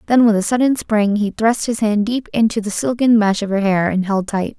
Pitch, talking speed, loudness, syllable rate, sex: 215 Hz, 260 wpm, -17 LUFS, 5.3 syllables/s, female